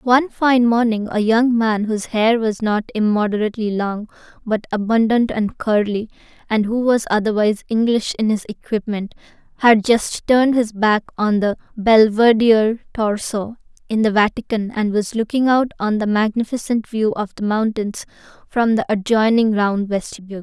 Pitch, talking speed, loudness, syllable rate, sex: 220 Hz, 155 wpm, -18 LUFS, 4.9 syllables/s, female